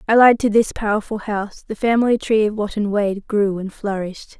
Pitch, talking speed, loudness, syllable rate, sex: 210 Hz, 190 wpm, -19 LUFS, 5.7 syllables/s, female